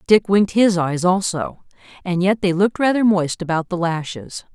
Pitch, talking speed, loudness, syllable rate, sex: 185 Hz, 185 wpm, -18 LUFS, 5.1 syllables/s, female